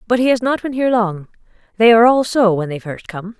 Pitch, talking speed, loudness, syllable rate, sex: 220 Hz, 265 wpm, -15 LUFS, 6.2 syllables/s, female